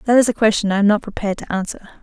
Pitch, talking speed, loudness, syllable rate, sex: 210 Hz, 295 wpm, -18 LUFS, 7.8 syllables/s, female